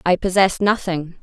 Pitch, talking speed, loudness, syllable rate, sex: 185 Hz, 145 wpm, -18 LUFS, 4.7 syllables/s, female